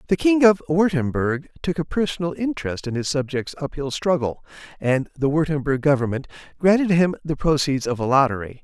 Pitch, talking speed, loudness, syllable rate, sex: 150 Hz, 165 wpm, -21 LUFS, 5.5 syllables/s, male